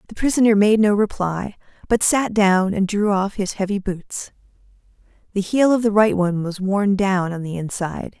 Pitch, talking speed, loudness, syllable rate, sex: 200 Hz, 190 wpm, -19 LUFS, 5.0 syllables/s, female